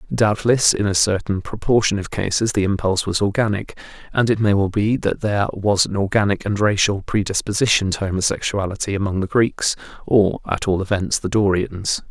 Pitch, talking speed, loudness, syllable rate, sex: 100 Hz, 175 wpm, -19 LUFS, 5.4 syllables/s, male